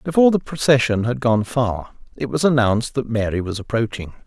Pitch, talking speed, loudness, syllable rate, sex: 125 Hz, 185 wpm, -19 LUFS, 5.7 syllables/s, male